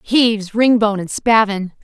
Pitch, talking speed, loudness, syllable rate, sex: 215 Hz, 130 wpm, -15 LUFS, 4.8 syllables/s, female